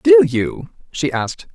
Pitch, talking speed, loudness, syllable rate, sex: 135 Hz, 155 wpm, -17 LUFS, 4.0 syllables/s, male